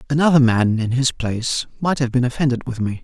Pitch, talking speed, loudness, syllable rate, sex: 125 Hz, 220 wpm, -19 LUFS, 6.1 syllables/s, male